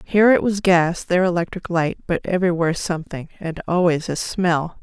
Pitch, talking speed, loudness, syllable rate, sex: 175 Hz, 175 wpm, -20 LUFS, 5.6 syllables/s, female